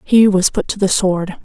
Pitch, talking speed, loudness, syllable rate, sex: 195 Hz, 250 wpm, -15 LUFS, 4.5 syllables/s, female